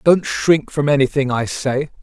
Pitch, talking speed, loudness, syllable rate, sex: 140 Hz, 180 wpm, -17 LUFS, 4.4 syllables/s, male